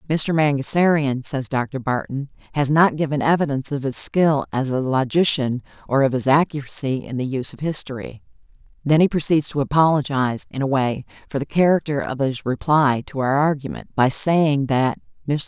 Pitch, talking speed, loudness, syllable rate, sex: 140 Hz, 175 wpm, -20 LUFS, 5.2 syllables/s, female